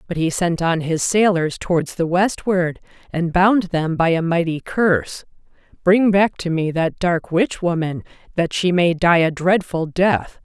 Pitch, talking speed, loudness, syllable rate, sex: 175 Hz, 180 wpm, -18 LUFS, 4.2 syllables/s, female